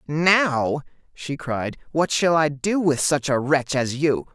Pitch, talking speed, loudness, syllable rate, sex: 150 Hz, 180 wpm, -21 LUFS, 3.5 syllables/s, male